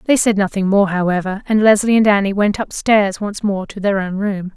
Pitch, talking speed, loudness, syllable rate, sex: 200 Hz, 225 wpm, -16 LUFS, 5.3 syllables/s, female